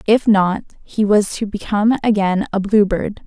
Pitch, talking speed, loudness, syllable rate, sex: 205 Hz, 185 wpm, -17 LUFS, 4.6 syllables/s, female